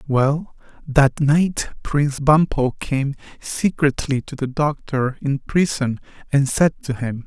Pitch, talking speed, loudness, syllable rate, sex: 145 Hz, 130 wpm, -20 LUFS, 3.6 syllables/s, male